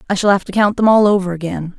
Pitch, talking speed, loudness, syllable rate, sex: 195 Hz, 300 wpm, -15 LUFS, 6.9 syllables/s, female